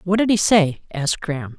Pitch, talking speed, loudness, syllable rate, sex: 175 Hz, 230 wpm, -19 LUFS, 5.7 syllables/s, male